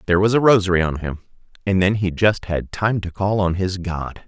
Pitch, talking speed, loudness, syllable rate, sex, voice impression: 95 Hz, 240 wpm, -19 LUFS, 5.5 syllables/s, male, masculine, adult-like, slightly thick, cool, sincere, slightly calm, slightly elegant